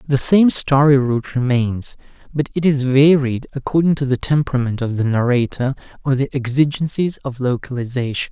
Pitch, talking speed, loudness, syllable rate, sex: 135 Hz, 150 wpm, -17 LUFS, 5.1 syllables/s, male